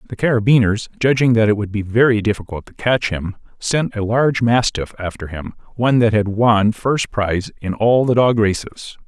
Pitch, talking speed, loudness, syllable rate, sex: 115 Hz, 190 wpm, -17 LUFS, 5.2 syllables/s, male